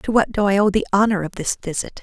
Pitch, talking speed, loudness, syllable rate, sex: 200 Hz, 295 wpm, -19 LUFS, 6.5 syllables/s, female